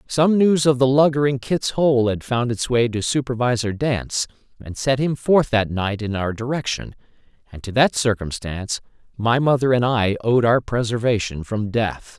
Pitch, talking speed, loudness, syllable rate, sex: 120 Hz, 180 wpm, -20 LUFS, 4.7 syllables/s, male